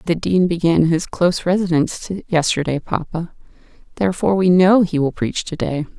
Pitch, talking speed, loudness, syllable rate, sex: 170 Hz, 160 wpm, -18 LUFS, 5.5 syllables/s, female